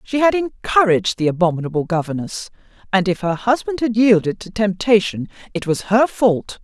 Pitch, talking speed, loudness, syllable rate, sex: 205 Hz, 165 wpm, -18 LUFS, 5.3 syllables/s, female